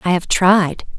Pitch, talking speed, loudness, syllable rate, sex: 180 Hz, 185 wpm, -15 LUFS, 3.8 syllables/s, female